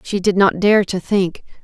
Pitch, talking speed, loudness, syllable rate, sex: 190 Hz, 220 wpm, -16 LUFS, 4.4 syllables/s, female